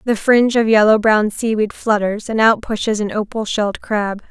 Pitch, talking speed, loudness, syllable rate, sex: 215 Hz, 195 wpm, -16 LUFS, 5.1 syllables/s, female